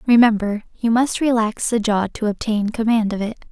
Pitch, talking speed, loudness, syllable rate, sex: 225 Hz, 190 wpm, -19 LUFS, 5.1 syllables/s, female